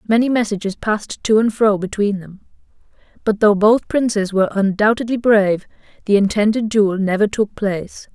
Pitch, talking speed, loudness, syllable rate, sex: 210 Hz, 155 wpm, -17 LUFS, 5.4 syllables/s, female